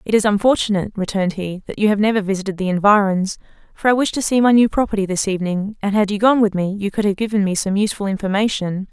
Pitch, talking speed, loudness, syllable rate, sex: 200 Hz, 240 wpm, -18 LUFS, 6.8 syllables/s, female